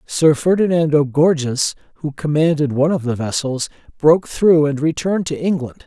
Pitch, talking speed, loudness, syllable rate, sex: 150 Hz, 155 wpm, -17 LUFS, 5.2 syllables/s, male